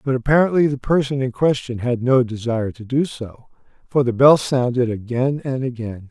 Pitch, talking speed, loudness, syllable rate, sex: 125 Hz, 185 wpm, -19 LUFS, 5.2 syllables/s, male